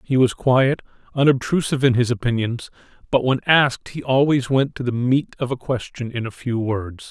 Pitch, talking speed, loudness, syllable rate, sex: 125 Hz, 195 wpm, -20 LUFS, 5.2 syllables/s, male